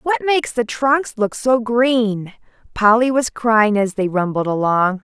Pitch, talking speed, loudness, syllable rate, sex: 225 Hz, 165 wpm, -17 LUFS, 3.9 syllables/s, female